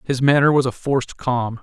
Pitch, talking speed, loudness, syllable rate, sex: 130 Hz, 220 wpm, -19 LUFS, 5.2 syllables/s, male